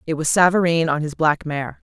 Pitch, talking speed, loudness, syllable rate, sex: 160 Hz, 220 wpm, -19 LUFS, 5.3 syllables/s, female